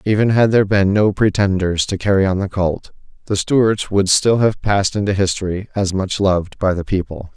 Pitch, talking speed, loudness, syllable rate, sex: 100 Hz, 205 wpm, -17 LUFS, 5.3 syllables/s, male